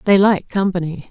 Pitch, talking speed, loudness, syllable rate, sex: 190 Hz, 165 wpm, -17 LUFS, 5.2 syllables/s, female